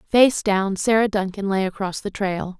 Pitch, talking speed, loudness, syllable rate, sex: 200 Hz, 185 wpm, -21 LUFS, 4.5 syllables/s, female